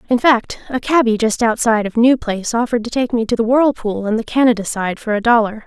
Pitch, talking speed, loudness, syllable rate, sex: 230 Hz, 245 wpm, -16 LUFS, 6.1 syllables/s, female